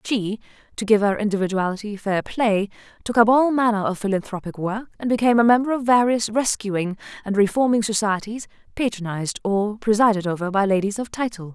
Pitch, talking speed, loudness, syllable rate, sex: 215 Hz, 165 wpm, -21 LUFS, 5.7 syllables/s, female